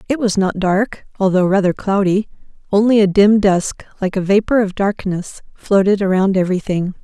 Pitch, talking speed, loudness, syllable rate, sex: 195 Hz, 160 wpm, -16 LUFS, 5.0 syllables/s, female